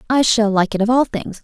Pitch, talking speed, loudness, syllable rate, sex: 220 Hz, 290 wpm, -16 LUFS, 5.6 syllables/s, female